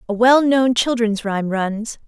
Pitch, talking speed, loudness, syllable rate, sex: 230 Hz, 145 wpm, -17 LUFS, 4.3 syllables/s, female